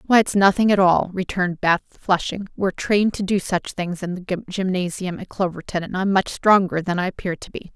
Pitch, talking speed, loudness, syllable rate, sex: 185 Hz, 215 wpm, -21 LUFS, 5.4 syllables/s, female